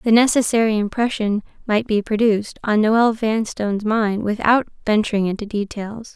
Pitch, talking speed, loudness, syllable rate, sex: 215 Hz, 135 wpm, -19 LUFS, 5.0 syllables/s, female